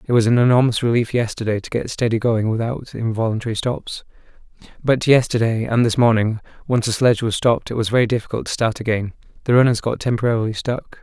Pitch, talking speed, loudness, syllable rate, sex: 115 Hz, 185 wpm, -19 LUFS, 6.3 syllables/s, male